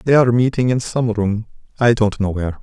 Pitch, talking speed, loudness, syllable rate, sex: 115 Hz, 205 wpm, -17 LUFS, 6.2 syllables/s, male